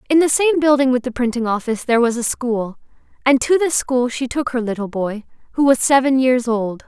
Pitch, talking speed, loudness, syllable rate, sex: 250 Hz, 225 wpm, -17 LUFS, 5.6 syllables/s, female